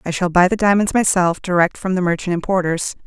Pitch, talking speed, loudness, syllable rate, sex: 180 Hz, 215 wpm, -17 LUFS, 5.9 syllables/s, female